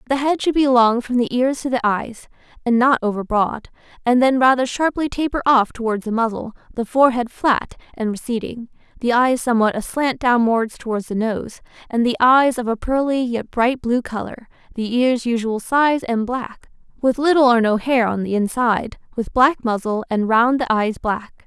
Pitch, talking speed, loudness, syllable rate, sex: 240 Hz, 195 wpm, -19 LUFS, 4.9 syllables/s, female